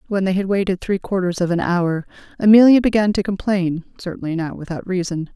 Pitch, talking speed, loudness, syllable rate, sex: 185 Hz, 180 wpm, -18 LUFS, 5.8 syllables/s, female